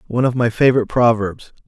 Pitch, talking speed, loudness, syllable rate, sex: 115 Hz, 180 wpm, -16 LUFS, 7.1 syllables/s, male